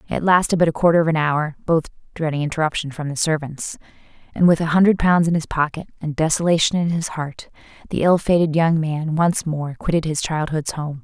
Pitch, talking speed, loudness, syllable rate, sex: 160 Hz, 205 wpm, -19 LUFS, 5.6 syllables/s, female